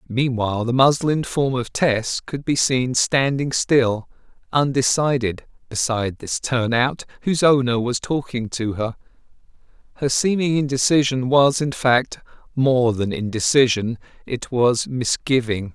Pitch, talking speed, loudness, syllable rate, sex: 130 Hz, 130 wpm, -20 LUFS, 4.3 syllables/s, male